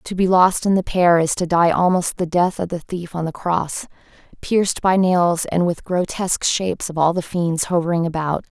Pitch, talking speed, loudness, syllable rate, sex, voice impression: 175 Hz, 215 wpm, -19 LUFS, 5.0 syllables/s, female, very feminine, slightly young, slightly adult-like, thin, tensed, powerful, bright, slightly hard, clear, very fluent, cute, slightly cool, slightly intellectual, refreshing, sincere, calm, friendly, reassuring, unique, slightly elegant, wild, slightly sweet, slightly lively, slightly strict, slightly modest, slightly light